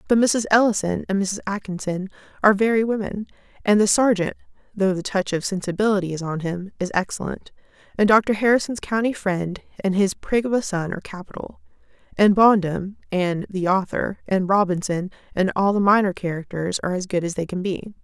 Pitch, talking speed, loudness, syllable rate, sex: 195 Hz, 180 wpm, -21 LUFS, 5.5 syllables/s, female